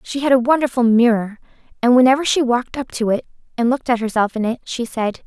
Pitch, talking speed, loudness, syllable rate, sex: 240 Hz, 230 wpm, -17 LUFS, 6.4 syllables/s, female